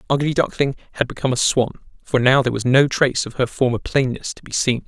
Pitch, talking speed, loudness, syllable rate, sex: 130 Hz, 245 wpm, -19 LUFS, 6.7 syllables/s, male